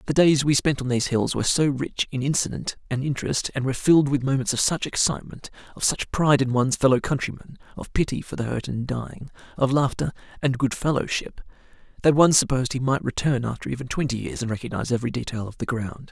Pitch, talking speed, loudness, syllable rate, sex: 130 Hz, 215 wpm, -23 LUFS, 6.5 syllables/s, male